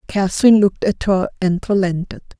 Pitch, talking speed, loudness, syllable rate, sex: 195 Hz, 150 wpm, -17 LUFS, 6.3 syllables/s, female